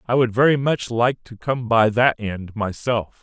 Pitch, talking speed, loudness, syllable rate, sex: 115 Hz, 205 wpm, -20 LUFS, 4.2 syllables/s, male